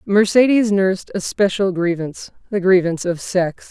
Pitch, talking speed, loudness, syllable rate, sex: 190 Hz, 130 wpm, -17 LUFS, 5.0 syllables/s, female